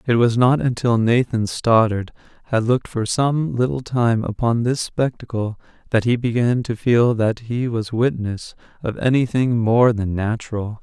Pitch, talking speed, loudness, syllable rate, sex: 115 Hz, 165 wpm, -19 LUFS, 4.4 syllables/s, male